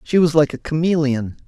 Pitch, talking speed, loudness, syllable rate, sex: 150 Hz, 205 wpm, -18 LUFS, 5.4 syllables/s, male